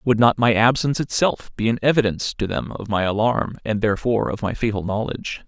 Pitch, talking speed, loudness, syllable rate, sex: 115 Hz, 210 wpm, -21 LUFS, 6.1 syllables/s, male